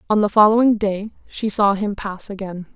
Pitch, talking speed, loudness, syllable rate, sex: 205 Hz, 195 wpm, -18 LUFS, 5.0 syllables/s, female